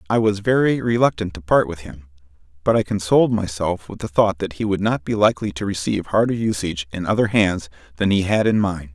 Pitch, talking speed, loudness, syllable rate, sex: 100 Hz, 220 wpm, -20 LUFS, 6.0 syllables/s, male